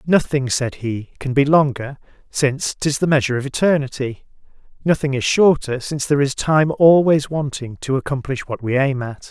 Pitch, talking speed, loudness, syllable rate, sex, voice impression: 140 Hz, 175 wpm, -18 LUFS, 5.2 syllables/s, male, masculine, very adult-like, slightly thick, slightly soft, sincere, calm, slightly friendly